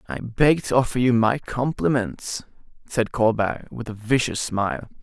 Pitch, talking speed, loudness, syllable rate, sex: 120 Hz, 155 wpm, -22 LUFS, 4.4 syllables/s, male